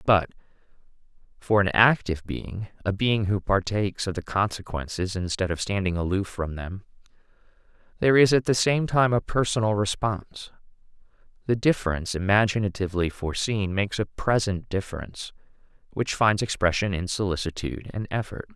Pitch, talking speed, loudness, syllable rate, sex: 100 Hz, 135 wpm, -25 LUFS, 5.6 syllables/s, male